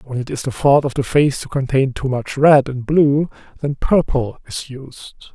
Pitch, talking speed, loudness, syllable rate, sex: 135 Hz, 215 wpm, -17 LUFS, 4.5 syllables/s, male